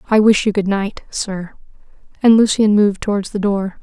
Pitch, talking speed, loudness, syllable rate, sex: 205 Hz, 190 wpm, -16 LUFS, 5.1 syllables/s, female